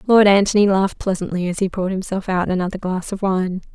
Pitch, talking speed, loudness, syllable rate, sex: 190 Hz, 210 wpm, -19 LUFS, 6.3 syllables/s, female